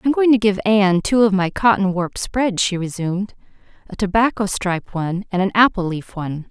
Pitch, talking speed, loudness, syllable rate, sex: 200 Hz, 205 wpm, -18 LUFS, 5.6 syllables/s, female